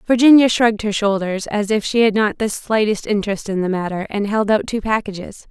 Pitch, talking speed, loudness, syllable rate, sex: 210 Hz, 220 wpm, -17 LUFS, 5.6 syllables/s, female